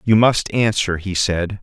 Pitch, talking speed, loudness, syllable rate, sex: 100 Hz, 185 wpm, -18 LUFS, 3.9 syllables/s, male